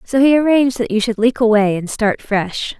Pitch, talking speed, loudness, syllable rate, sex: 235 Hz, 235 wpm, -15 LUFS, 5.2 syllables/s, female